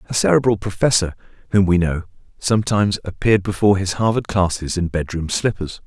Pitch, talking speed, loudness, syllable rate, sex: 95 Hz, 155 wpm, -19 LUFS, 6.2 syllables/s, male